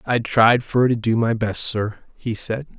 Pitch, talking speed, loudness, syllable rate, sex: 115 Hz, 215 wpm, -20 LUFS, 4.1 syllables/s, male